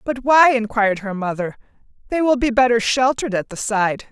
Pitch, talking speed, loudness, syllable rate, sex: 235 Hz, 190 wpm, -18 LUFS, 5.4 syllables/s, female